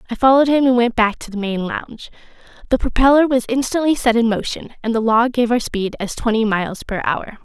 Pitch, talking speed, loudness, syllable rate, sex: 235 Hz, 225 wpm, -17 LUFS, 5.9 syllables/s, female